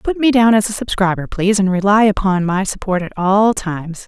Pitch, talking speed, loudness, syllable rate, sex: 200 Hz, 220 wpm, -15 LUFS, 5.3 syllables/s, female